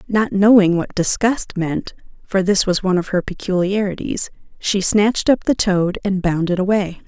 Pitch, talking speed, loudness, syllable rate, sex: 195 Hz, 170 wpm, -18 LUFS, 4.8 syllables/s, female